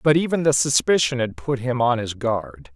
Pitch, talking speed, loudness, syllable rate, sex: 125 Hz, 220 wpm, -21 LUFS, 4.9 syllables/s, male